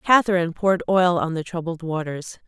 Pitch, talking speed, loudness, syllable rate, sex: 175 Hz, 170 wpm, -22 LUFS, 5.8 syllables/s, female